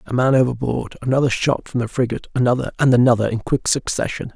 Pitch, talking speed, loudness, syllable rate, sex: 125 Hz, 165 wpm, -19 LUFS, 6.4 syllables/s, male